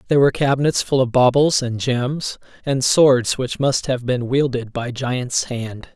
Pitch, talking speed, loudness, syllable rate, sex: 130 Hz, 180 wpm, -19 LUFS, 4.4 syllables/s, male